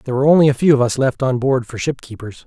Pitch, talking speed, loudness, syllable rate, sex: 130 Hz, 315 wpm, -16 LUFS, 7.0 syllables/s, male